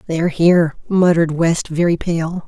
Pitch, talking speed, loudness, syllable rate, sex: 165 Hz, 170 wpm, -16 LUFS, 5.6 syllables/s, female